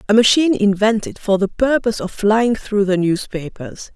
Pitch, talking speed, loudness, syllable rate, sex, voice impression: 205 Hz, 165 wpm, -17 LUFS, 5.0 syllables/s, female, feminine, middle-aged, tensed, powerful, hard, raspy, intellectual, calm, friendly, elegant, lively, slightly strict